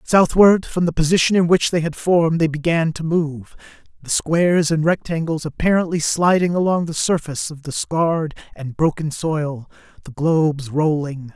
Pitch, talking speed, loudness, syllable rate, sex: 160 Hz, 165 wpm, -18 LUFS, 4.9 syllables/s, male